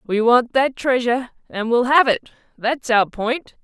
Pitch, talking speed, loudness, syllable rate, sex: 240 Hz, 165 wpm, -18 LUFS, 4.4 syllables/s, female